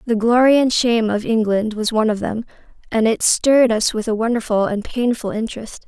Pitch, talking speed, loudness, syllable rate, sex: 225 Hz, 205 wpm, -17 LUFS, 5.7 syllables/s, female